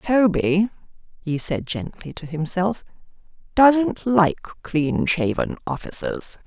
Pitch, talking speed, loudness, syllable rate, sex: 190 Hz, 100 wpm, -21 LUFS, 3.6 syllables/s, female